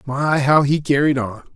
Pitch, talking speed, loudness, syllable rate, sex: 140 Hz, 195 wpm, -17 LUFS, 4.4 syllables/s, male